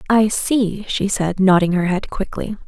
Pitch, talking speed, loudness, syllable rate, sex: 195 Hz, 180 wpm, -18 LUFS, 4.2 syllables/s, female